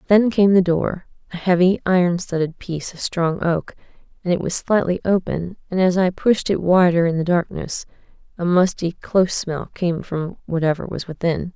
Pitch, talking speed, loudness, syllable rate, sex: 175 Hz, 175 wpm, -20 LUFS, 4.9 syllables/s, female